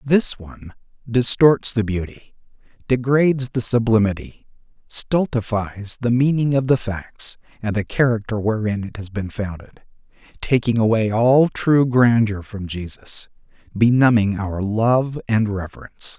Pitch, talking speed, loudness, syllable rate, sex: 115 Hz, 125 wpm, -19 LUFS, 4.3 syllables/s, male